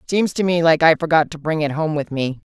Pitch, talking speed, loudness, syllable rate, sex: 160 Hz, 290 wpm, -18 LUFS, 5.9 syllables/s, female